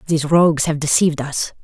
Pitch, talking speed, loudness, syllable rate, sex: 155 Hz, 185 wpm, -17 LUFS, 6.5 syllables/s, female